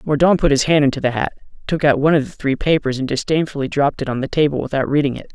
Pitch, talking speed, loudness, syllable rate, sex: 145 Hz, 270 wpm, -18 LUFS, 7.1 syllables/s, male